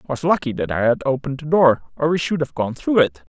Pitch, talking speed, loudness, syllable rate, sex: 140 Hz, 285 wpm, -19 LUFS, 6.4 syllables/s, male